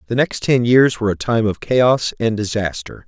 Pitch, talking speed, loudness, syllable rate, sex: 110 Hz, 215 wpm, -17 LUFS, 5.0 syllables/s, male